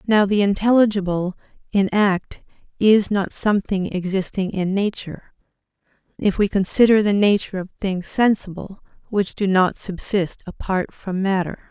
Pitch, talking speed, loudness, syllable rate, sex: 195 Hz, 135 wpm, -20 LUFS, 4.6 syllables/s, female